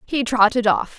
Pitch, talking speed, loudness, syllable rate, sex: 235 Hz, 185 wpm, -18 LUFS, 4.6 syllables/s, female